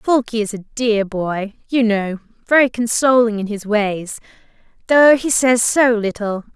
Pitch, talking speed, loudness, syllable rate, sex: 225 Hz, 145 wpm, -17 LUFS, 4.1 syllables/s, female